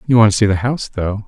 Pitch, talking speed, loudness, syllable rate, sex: 110 Hz, 330 wpm, -16 LUFS, 7.0 syllables/s, male